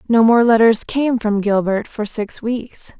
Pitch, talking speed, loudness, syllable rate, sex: 225 Hz, 180 wpm, -16 LUFS, 3.9 syllables/s, female